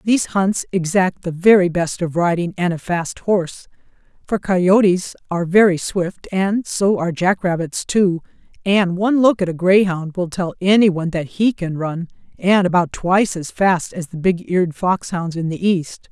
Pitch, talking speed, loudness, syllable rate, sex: 180 Hz, 180 wpm, -18 LUFS, 4.7 syllables/s, female